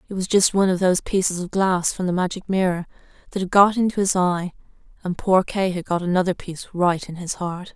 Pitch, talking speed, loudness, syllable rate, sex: 185 Hz, 230 wpm, -21 LUFS, 5.9 syllables/s, female